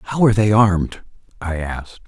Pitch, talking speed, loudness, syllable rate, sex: 100 Hz, 175 wpm, -18 LUFS, 5.5 syllables/s, male